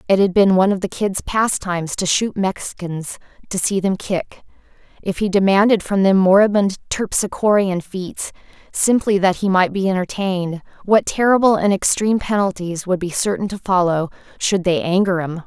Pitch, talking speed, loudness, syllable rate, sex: 190 Hz, 165 wpm, -18 LUFS, 5.1 syllables/s, female